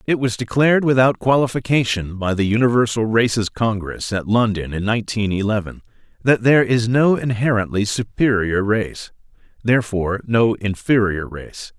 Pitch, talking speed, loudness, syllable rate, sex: 110 Hz, 130 wpm, -18 LUFS, 5.1 syllables/s, male